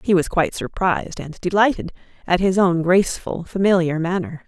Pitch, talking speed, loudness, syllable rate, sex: 180 Hz, 160 wpm, -19 LUFS, 5.5 syllables/s, female